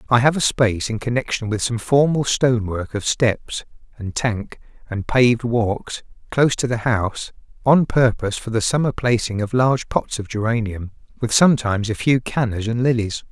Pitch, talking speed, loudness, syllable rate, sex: 115 Hz, 175 wpm, -20 LUFS, 5.2 syllables/s, male